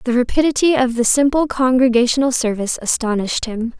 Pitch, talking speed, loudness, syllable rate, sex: 250 Hz, 140 wpm, -16 LUFS, 6.1 syllables/s, female